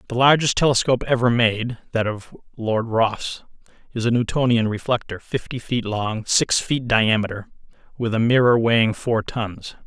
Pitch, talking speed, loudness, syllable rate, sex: 115 Hz, 150 wpm, -20 LUFS, 4.9 syllables/s, male